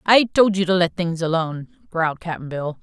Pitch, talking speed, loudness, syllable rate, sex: 175 Hz, 210 wpm, -20 LUFS, 5.0 syllables/s, female